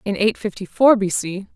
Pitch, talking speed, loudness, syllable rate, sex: 200 Hz, 230 wpm, -19 LUFS, 5.0 syllables/s, female